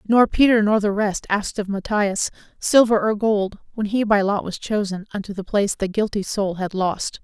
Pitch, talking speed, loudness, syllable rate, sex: 205 Hz, 205 wpm, -21 LUFS, 5.1 syllables/s, female